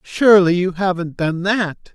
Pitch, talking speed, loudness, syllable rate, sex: 185 Hz, 155 wpm, -16 LUFS, 4.3 syllables/s, male